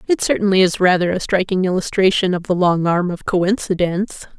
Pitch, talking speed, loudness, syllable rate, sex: 185 Hz, 180 wpm, -17 LUFS, 5.6 syllables/s, female